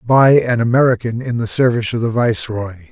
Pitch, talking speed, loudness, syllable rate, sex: 115 Hz, 185 wpm, -15 LUFS, 5.9 syllables/s, male